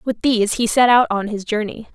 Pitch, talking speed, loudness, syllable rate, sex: 225 Hz, 245 wpm, -17 LUFS, 5.6 syllables/s, female